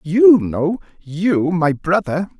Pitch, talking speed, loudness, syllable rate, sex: 170 Hz, 100 wpm, -16 LUFS, 3.1 syllables/s, male